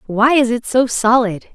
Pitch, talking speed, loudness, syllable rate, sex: 240 Hz, 195 wpm, -15 LUFS, 4.5 syllables/s, female